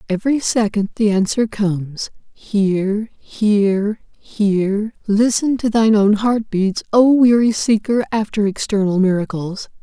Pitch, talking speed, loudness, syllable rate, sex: 210 Hz, 110 wpm, -17 LUFS, 4.3 syllables/s, female